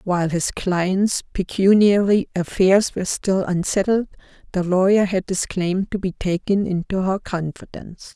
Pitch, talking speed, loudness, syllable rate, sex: 190 Hz, 140 wpm, -20 LUFS, 4.7 syllables/s, female